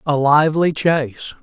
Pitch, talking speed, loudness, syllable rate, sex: 150 Hz, 125 wpm, -16 LUFS, 4.8 syllables/s, male